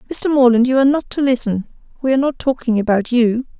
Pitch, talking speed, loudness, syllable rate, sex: 250 Hz, 215 wpm, -16 LUFS, 6.5 syllables/s, female